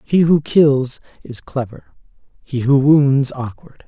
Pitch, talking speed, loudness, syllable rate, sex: 140 Hz, 140 wpm, -16 LUFS, 3.7 syllables/s, male